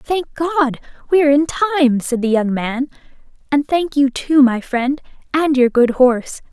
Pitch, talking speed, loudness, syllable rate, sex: 275 Hz, 185 wpm, -16 LUFS, 4.6 syllables/s, female